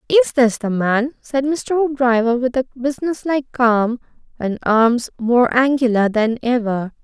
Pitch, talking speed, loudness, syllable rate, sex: 250 Hz, 155 wpm, -17 LUFS, 4.1 syllables/s, female